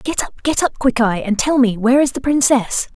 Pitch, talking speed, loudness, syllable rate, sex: 255 Hz, 240 wpm, -16 LUFS, 5.2 syllables/s, female